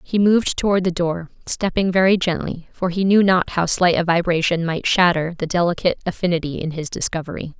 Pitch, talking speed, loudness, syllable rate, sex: 175 Hz, 190 wpm, -19 LUFS, 5.7 syllables/s, female